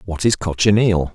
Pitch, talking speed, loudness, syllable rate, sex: 95 Hz, 155 wpm, -17 LUFS, 5.0 syllables/s, male